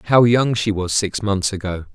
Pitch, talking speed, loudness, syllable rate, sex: 100 Hz, 215 wpm, -19 LUFS, 4.8 syllables/s, male